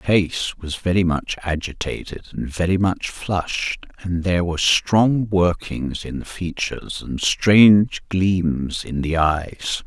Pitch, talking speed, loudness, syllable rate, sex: 90 Hz, 145 wpm, -20 LUFS, 3.9 syllables/s, male